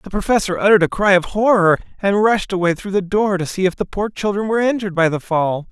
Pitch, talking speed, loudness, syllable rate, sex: 190 Hz, 250 wpm, -17 LUFS, 6.3 syllables/s, male